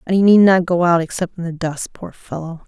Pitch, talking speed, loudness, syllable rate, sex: 175 Hz, 270 wpm, -15 LUFS, 5.6 syllables/s, female